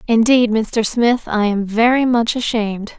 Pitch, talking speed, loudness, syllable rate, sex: 225 Hz, 160 wpm, -16 LUFS, 4.3 syllables/s, female